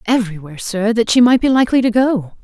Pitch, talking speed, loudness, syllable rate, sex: 225 Hz, 220 wpm, -14 LUFS, 6.6 syllables/s, female